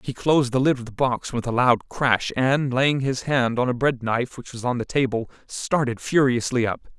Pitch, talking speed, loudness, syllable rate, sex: 125 Hz, 230 wpm, -22 LUFS, 5.1 syllables/s, male